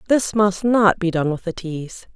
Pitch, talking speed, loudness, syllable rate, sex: 190 Hz, 225 wpm, -19 LUFS, 4.2 syllables/s, female